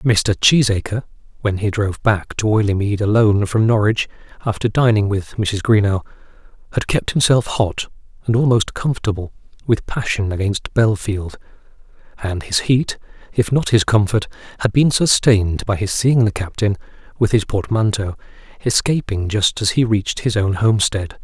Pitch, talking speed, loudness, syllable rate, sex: 105 Hz, 150 wpm, -18 LUFS, 5.0 syllables/s, male